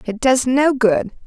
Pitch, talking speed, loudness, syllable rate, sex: 245 Hz, 190 wpm, -16 LUFS, 3.9 syllables/s, female